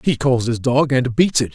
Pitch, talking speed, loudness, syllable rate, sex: 130 Hz, 270 wpm, -17 LUFS, 4.8 syllables/s, male